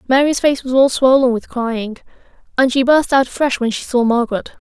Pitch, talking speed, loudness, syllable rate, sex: 255 Hz, 205 wpm, -15 LUFS, 5.4 syllables/s, female